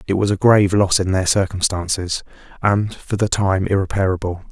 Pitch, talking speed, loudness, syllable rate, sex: 95 Hz, 175 wpm, -18 LUFS, 5.3 syllables/s, male